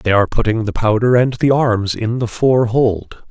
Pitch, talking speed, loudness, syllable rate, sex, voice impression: 115 Hz, 220 wpm, -15 LUFS, 4.6 syllables/s, male, very masculine, slightly old, very thick, very tensed, very powerful, bright, slightly hard, slightly muffled, fluent, slightly raspy, very cool, very intellectual, refreshing, very sincere, very calm, very mature, friendly, very reassuring, very unique, elegant, very wild, very sweet, lively, very kind, slightly modest